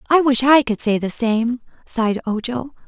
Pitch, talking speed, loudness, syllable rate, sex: 240 Hz, 190 wpm, -18 LUFS, 4.9 syllables/s, female